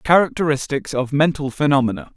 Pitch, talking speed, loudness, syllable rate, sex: 140 Hz, 110 wpm, -19 LUFS, 5.7 syllables/s, male